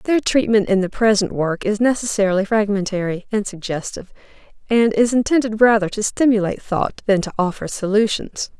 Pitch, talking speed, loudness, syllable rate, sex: 210 Hz, 155 wpm, -18 LUFS, 5.6 syllables/s, female